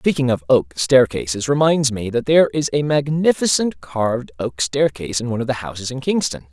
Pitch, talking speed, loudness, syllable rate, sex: 130 Hz, 195 wpm, -18 LUFS, 5.6 syllables/s, male